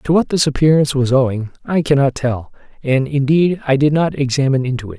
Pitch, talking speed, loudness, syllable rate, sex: 140 Hz, 205 wpm, -16 LUFS, 5.9 syllables/s, male